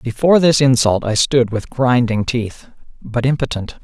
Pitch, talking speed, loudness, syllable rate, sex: 125 Hz, 155 wpm, -16 LUFS, 4.6 syllables/s, male